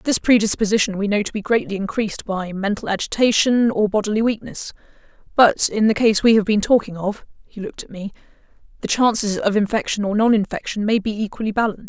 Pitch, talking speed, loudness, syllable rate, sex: 210 Hz, 190 wpm, -19 LUFS, 6.0 syllables/s, female